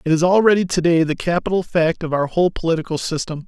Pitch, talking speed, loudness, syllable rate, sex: 170 Hz, 225 wpm, -18 LUFS, 6.6 syllables/s, male